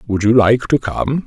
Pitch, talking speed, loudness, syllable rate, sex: 120 Hz, 235 wpm, -15 LUFS, 4.5 syllables/s, male